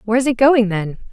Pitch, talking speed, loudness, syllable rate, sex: 230 Hz, 270 wpm, -16 LUFS, 6.7 syllables/s, female